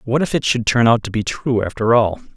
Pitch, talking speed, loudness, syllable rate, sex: 120 Hz, 280 wpm, -17 LUFS, 5.6 syllables/s, male